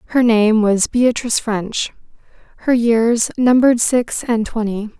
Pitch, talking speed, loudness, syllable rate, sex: 230 Hz, 130 wpm, -16 LUFS, 4.1 syllables/s, female